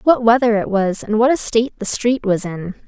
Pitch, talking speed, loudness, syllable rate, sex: 225 Hz, 250 wpm, -17 LUFS, 5.4 syllables/s, female